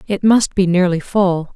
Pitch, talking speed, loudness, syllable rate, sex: 190 Hz, 195 wpm, -15 LUFS, 4.4 syllables/s, female